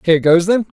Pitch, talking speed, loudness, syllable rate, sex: 180 Hz, 225 wpm, -14 LUFS, 6.4 syllables/s, male